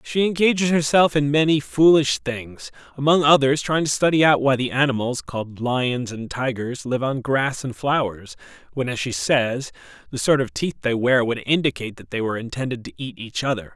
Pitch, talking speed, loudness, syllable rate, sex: 135 Hz, 195 wpm, -21 LUFS, 5.2 syllables/s, male